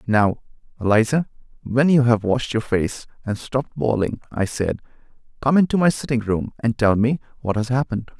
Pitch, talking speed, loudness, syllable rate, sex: 120 Hz, 175 wpm, -21 LUFS, 5.2 syllables/s, male